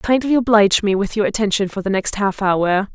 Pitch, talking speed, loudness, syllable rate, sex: 205 Hz, 225 wpm, -17 LUFS, 5.5 syllables/s, female